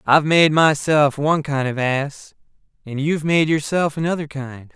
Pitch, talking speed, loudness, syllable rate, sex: 150 Hz, 165 wpm, -18 LUFS, 4.9 syllables/s, male